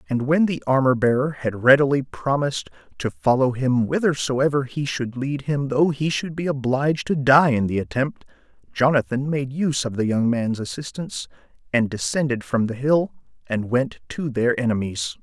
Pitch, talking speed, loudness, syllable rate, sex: 130 Hz, 175 wpm, -22 LUFS, 5.0 syllables/s, male